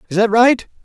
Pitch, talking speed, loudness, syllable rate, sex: 225 Hz, 215 wpm, -14 LUFS, 5.8 syllables/s, male